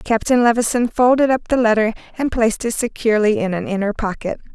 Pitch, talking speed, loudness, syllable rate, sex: 225 Hz, 185 wpm, -18 LUFS, 6.0 syllables/s, female